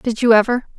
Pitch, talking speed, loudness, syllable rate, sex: 230 Hz, 230 wpm, -15 LUFS, 6.0 syllables/s, female